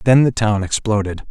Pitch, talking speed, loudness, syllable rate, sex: 110 Hz, 185 wpm, -17 LUFS, 5.1 syllables/s, male